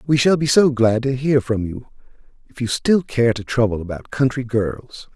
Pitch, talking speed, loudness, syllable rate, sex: 125 Hz, 210 wpm, -19 LUFS, 4.8 syllables/s, male